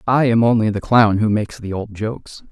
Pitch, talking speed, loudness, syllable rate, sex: 110 Hz, 240 wpm, -17 LUFS, 5.6 syllables/s, male